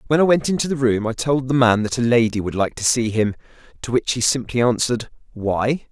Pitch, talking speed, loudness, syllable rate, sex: 120 Hz, 245 wpm, -19 LUFS, 5.7 syllables/s, male